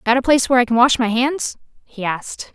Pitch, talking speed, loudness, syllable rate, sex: 245 Hz, 260 wpm, -17 LUFS, 6.4 syllables/s, female